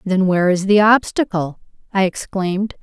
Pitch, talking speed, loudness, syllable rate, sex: 195 Hz, 150 wpm, -17 LUFS, 5.1 syllables/s, female